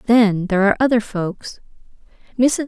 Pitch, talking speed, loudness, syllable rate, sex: 220 Hz, 110 wpm, -18 LUFS, 5.2 syllables/s, female